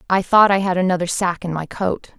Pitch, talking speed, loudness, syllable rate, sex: 185 Hz, 245 wpm, -18 LUFS, 5.7 syllables/s, female